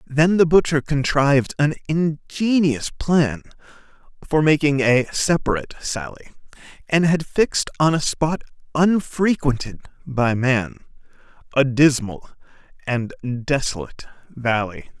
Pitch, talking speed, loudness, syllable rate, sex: 145 Hz, 105 wpm, -20 LUFS, 4.3 syllables/s, male